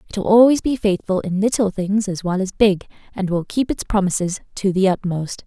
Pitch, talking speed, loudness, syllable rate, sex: 195 Hz, 220 wpm, -19 LUFS, 5.4 syllables/s, female